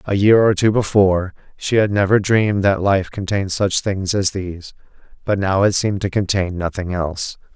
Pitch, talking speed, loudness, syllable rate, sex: 95 Hz, 190 wpm, -18 LUFS, 5.3 syllables/s, male